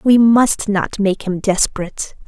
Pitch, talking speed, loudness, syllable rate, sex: 205 Hz, 160 wpm, -16 LUFS, 4.2 syllables/s, female